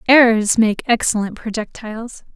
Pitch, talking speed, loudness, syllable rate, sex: 225 Hz, 100 wpm, -16 LUFS, 4.8 syllables/s, female